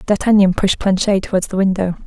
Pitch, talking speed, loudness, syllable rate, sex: 195 Hz, 175 wpm, -16 LUFS, 5.9 syllables/s, female